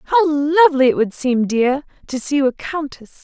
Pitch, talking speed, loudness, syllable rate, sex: 280 Hz, 205 wpm, -17 LUFS, 4.7 syllables/s, female